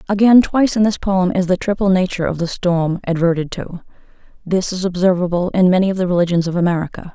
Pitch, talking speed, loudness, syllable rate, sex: 180 Hz, 200 wpm, -16 LUFS, 6.4 syllables/s, female